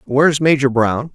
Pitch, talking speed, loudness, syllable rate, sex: 135 Hz, 210 wpm, -15 LUFS, 5.8 syllables/s, male